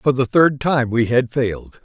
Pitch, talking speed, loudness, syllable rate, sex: 125 Hz, 230 wpm, -18 LUFS, 4.5 syllables/s, male